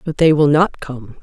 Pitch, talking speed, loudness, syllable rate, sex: 145 Hz, 245 wpm, -14 LUFS, 4.6 syllables/s, female